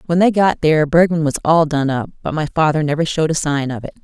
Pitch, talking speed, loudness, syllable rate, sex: 155 Hz, 270 wpm, -16 LUFS, 6.4 syllables/s, female